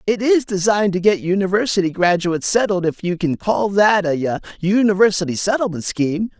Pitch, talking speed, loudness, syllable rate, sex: 190 Hz, 160 wpm, -18 LUFS, 5.3 syllables/s, male